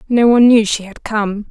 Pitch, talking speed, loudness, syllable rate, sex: 220 Hz, 240 wpm, -13 LUFS, 5.3 syllables/s, female